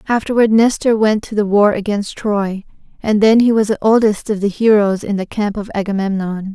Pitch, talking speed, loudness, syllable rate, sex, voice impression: 210 Hz, 200 wpm, -15 LUFS, 5.2 syllables/s, female, very feminine, slightly young, slightly adult-like, thin, slightly relaxed, weak, slightly dark, soft, clear, fluent, very cute, intellectual, very refreshing, very sincere, very calm, very friendly, reassuring, unique, elegant, wild, very sweet, very kind, very modest, light